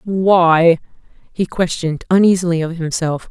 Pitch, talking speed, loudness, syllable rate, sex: 175 Hz, 110 wpm, -15 LUFS, 4.5 syllables/s, female